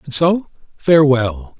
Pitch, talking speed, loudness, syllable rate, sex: 140 Hz, 115 wpm, -15 LUFS, 4.1 syllables/s, male